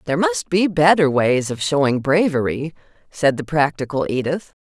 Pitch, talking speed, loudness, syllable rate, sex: 155 Hz, 155 wpm, -18 LUFS, 5.0 syllables/s, female